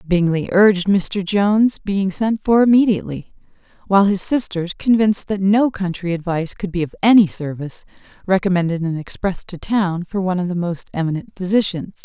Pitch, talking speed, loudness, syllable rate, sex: 190 Hz, 165 wpm, -18 LUFS, 5.6 syllables/s, female